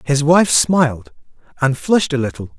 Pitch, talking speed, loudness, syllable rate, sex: 145 Hz, 165 wpm, -16 LUFS, 5.0 syllables/s, male